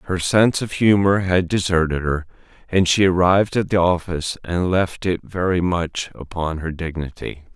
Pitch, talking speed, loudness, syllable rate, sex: 90 Hz, 165 wpm, -19 LUFS, 4.8 syllables/s, male